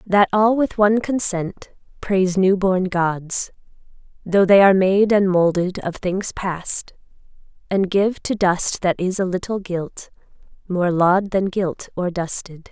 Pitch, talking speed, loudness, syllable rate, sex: 190 Hz, 155 wpm, -19 LUFS, 4.0 syllables/s, female